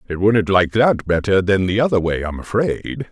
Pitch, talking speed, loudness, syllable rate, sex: 100 Hz, 210 wpm, -17 LUFS, 4.9 syllables/s, male